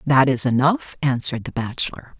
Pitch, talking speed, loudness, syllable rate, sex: 130 Hz, 165 wpm, -20 LUFS, 5.4 syllables/s, female